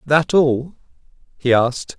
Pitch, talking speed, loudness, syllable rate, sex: 130 Hz, 120 wpm, -17 LUFS, 3.9 syllables/s, male